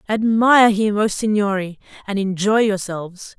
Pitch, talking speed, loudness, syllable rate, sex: 205 Hz, 125 wpm, -18 LUFS, 4.8 syllables/s, female